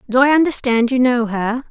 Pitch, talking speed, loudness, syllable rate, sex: 250 Hz, 210 wpm, -16 LUFS, 5.4 syllables/s, female